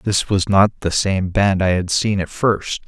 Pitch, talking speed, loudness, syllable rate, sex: 95 Hz, 230 wpm, -18 LUFS, 4.1 syllables/s, male